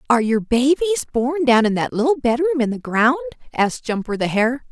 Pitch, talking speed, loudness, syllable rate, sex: 250 Hz, 205 wpm, -19 LUFS, 5.7 syllables/s, female